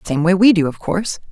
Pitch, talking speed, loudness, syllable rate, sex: 175 Hz, 275 wpm, -16 LUFS, 6.5 syllables/s, female